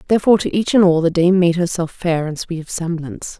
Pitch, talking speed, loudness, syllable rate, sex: 175 Hz, 245 wpm, -17 LUFS, 6.3 syllables/s, female